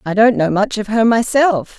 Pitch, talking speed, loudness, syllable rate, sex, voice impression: 220 Hz, 235 wpm, -14 LUFS, 4.7 syllables/s, female, feminine, very adult-like, slightly clear, slightly sincere, slightly calm, slightly friendly, reassuring